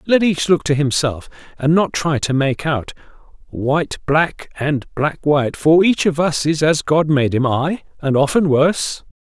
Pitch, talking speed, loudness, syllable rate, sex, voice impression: 150 Hz, 190 wpm, -17 LUFS, 4.4 syllables/s, male, masculine, adult-like, slightly thick, cool, sincere, slightly friendly, slightly kind